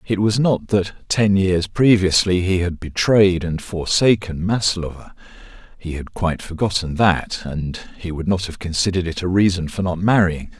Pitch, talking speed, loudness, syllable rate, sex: 90 Hz, 170 wpm, -19 LUFS, 4.7 syllables/s, male